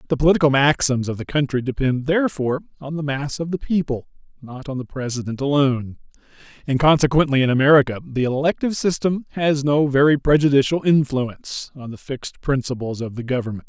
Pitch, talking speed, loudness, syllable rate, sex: 140 Hz, 165 wpm, -20 LUFS, 6.1 syllables/s, male